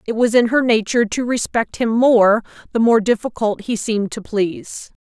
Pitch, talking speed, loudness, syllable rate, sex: 225 Hz, 190 wpm, -17 LUFS, 5.1 syllables/s, female